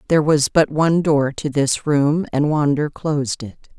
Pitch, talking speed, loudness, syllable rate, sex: 150 Hz, 190 wpm, -18 LUFS, 4.6 syllables/s, female